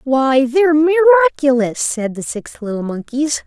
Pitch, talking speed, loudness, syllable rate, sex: 285 Hz, 140 wpm, -15 LUFS, 4.2 syllables/s, female